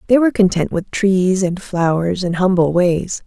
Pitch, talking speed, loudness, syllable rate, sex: 185 Hz, 185 wpm, -16 LUFS, 4.5 syllables/s, female